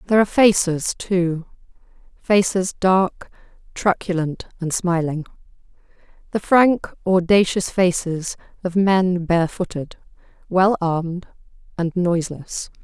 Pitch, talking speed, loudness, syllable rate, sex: 180 Hz, 90 wpm, -20 LUFS, 4.1 syllables/s, female